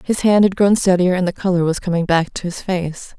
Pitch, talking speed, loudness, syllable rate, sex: 180 Hz, 265 wpm, -17 LUFS, 5.5 syllables/s, female